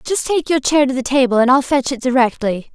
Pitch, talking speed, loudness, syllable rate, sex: 265 Hz, 260 wpm, -16 LUFS, 5.7 syllables/s, female